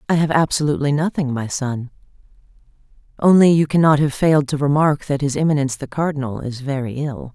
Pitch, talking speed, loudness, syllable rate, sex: 145 Hz, 170 wpm, -18 LUFS, 6.1 syllables/s, female